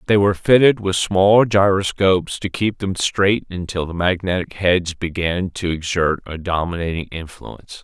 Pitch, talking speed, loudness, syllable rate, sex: 90 Hz, 155 wpm, -18 LUFS, 4.6 syllables/s, male